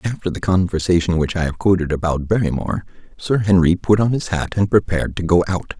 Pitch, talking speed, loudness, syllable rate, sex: 90 Hz, 205 wpm, -18 LUFS, 6.0 syllables/s, male